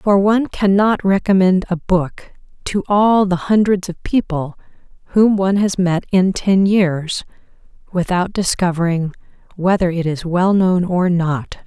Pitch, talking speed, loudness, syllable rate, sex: 185 Hz, 145 wpm, -16 LUFS, 4.2 syllables/s, female